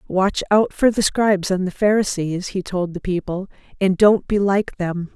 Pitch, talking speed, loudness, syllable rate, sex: 190 Hz, 200 wpm, -19 LUFS, 4.6 syllables/s, female